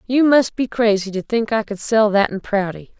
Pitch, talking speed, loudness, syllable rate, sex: 215 Hz, 240 wpm, -18 LUFS, 5.0 syllables/s, female